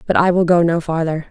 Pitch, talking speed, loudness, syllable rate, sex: 165 Hz, 275 wpm, -16 LUFS, 6.0 syllables/s, female